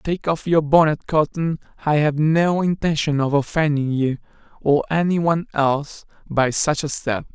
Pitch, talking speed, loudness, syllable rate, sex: 150 Hz, 165 wpm, -20 LUFS, 4.7 syllables/s, male